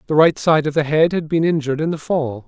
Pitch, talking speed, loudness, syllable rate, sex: 155 Hz, 290 wpm, -18 LUFS, 6.1 syllables/s, male